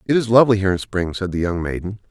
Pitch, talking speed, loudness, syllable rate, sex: 100 Hz, 285 wpm, -19 LUFS, 7.3 syllables/s, male